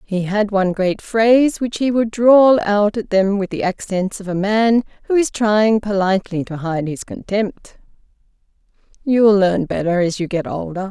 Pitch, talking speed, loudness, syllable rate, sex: 205 Hz, 180 wpm, -17 LUFS, 4.5 syllables/s, female